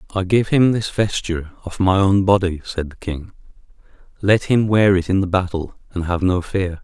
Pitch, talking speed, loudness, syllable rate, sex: 95 Hz, 200 wpm, -18 LUFS, 5.1 syllables/s, male